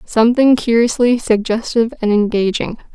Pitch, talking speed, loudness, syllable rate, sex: 225 Hz, 100 wpm, -15 LUFS, 5.3 syllables/s, female